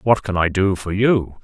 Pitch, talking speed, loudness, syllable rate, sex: 95 Hz, 250 wpm, -18 LUFS, 4.5 syllables/s, male